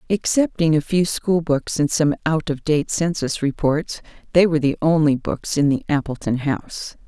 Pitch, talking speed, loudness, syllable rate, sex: 155 Hz, 180 wpm, -20 LUFS, 4.8 syllables/s, female